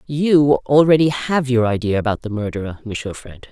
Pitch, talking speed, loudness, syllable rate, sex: 125 Hz, 170 wpm, -17 LUFS, 5.1 syllables/s, female